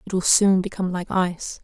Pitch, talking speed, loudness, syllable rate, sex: 185 Hz, 220 wpm, -21 LUFS, 6.1 syllables/s, female